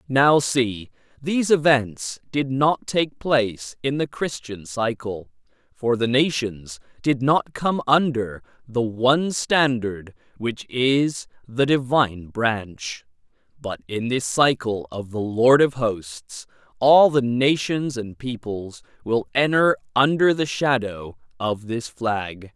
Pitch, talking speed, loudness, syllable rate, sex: 125 Hz, 130 wpm, -22 LUFS, 3.5 syllables/s, male